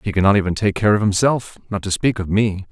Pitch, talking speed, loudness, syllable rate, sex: 100 Hz, 290 wpm, -18 LUFS, 6.1 syllables/s, male